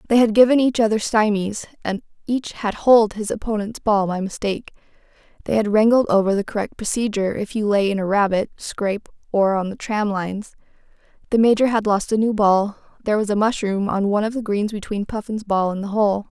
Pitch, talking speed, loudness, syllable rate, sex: 210 Hz, 205 wpm, -20 LUFS, 5.9 syllables/s, female